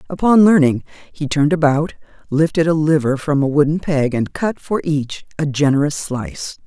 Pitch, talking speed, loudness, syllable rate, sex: 150 Hz, 170 wpm, -17 LUFS, 5.1 syllables/s, female